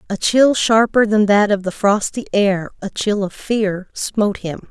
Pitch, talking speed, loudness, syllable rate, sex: 205 Hz, 165 wpm, -17 LUFS, 4.3 syllables/s, female